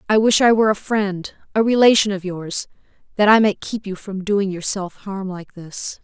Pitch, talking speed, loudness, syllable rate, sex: 200 Hz, 210 wpm, -19 LUFS, 4.8 syllables/s, female